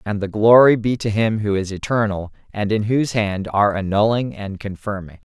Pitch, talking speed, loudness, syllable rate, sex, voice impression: 105 Hz, 190 wpm, -19 LUFS, 5.3 syllables/s, male, masculine, adult-like, clear, sincere, slightly unique